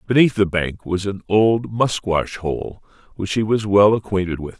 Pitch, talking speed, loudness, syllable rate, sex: 100 Hz, 185 wpm, -19 LUFS, 4.5 syllables/s, male